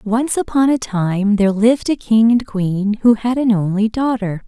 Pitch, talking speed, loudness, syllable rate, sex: 220 Hz, 200 wpm, -16 LUFS, 4.6 syllables/s, female